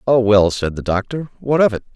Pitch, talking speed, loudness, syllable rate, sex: 115 Hz, 245 wpm, -17 LUFS, 5.6 syllables/s, male